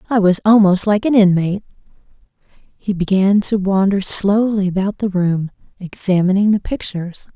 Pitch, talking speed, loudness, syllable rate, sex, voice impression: 195 Hz, 140 wpm, -16 LUFS, 4.9 syllables/s, female, feminine, slightly adult-like, soft, slightly cute, friendly, slightly sweet, kind